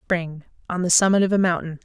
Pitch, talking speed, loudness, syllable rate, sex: 175 Hz, 195 wpm, -20 LUFS, 5.9 syllables/s, female